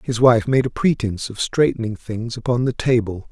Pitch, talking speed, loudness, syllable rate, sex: 115 Hz, 200 wpm, -20 LUFS, 5.3 syllables/s, male